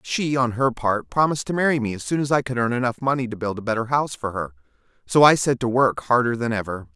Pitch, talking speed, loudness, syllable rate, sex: 120 Hz, 270 wpm, -21 LUFS, 6.4 syllables/s, male